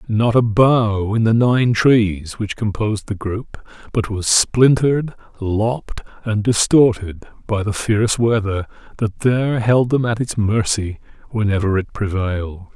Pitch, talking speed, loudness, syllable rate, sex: 110 Hz, 145 wpm, -18 LUFS, 4.2 syllables/s, male